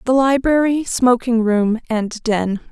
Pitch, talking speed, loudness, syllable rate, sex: 240 Hz, 135 wpm, -17 LUFS, 3.7 syllables/s, female